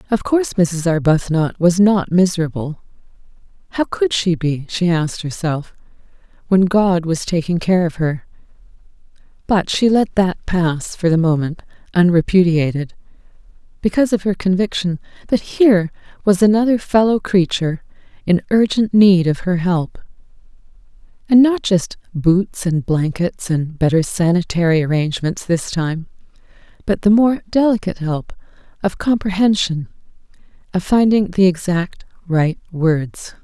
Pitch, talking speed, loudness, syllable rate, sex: 180 Hz, 125 wpm, -17 LUFS, 4.7 syllables/s, female